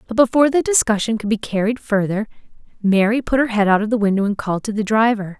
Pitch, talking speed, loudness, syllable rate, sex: 220 Hz, 235 wpm, -18 LUFS, 6.6 syllables/s, female